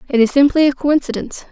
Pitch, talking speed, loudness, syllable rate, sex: 275 Hz, 200 wpm, -15 LUFS, 6.9 syllables/s, female